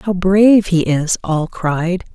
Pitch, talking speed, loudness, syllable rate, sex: 180 Hz, 170 wpm, -15 LUFS, 3.6 syllables/s, female